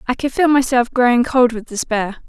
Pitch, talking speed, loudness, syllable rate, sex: 245 Hz, 210 wpm, -16 LUFS, 5.2 syllables/s, female